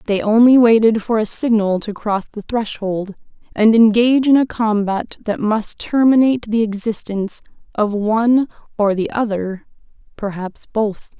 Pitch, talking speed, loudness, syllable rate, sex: 220 Hz, 140 wpm, -17 LUFS, 4.6 syllables/s, female